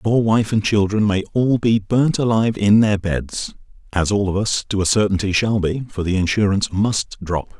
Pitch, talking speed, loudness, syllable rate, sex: 105 Hz, 200 wpm, -18 LUFS, 4.9 syllables/s, male